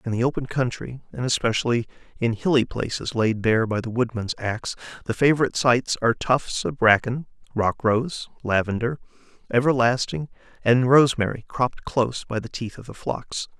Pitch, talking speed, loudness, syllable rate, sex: 120 Hz, 165 wpm, -23 LUFS, 5.4 syllables/s, male